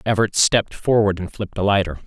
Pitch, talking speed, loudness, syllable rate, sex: 100 Hz, 205 wpm, -19 LUFS, 6.4 syllables/s, male